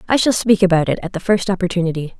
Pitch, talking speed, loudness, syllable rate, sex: 185 Hz, 245 wpm, -17 LUFS, 7.1 syllables/s, female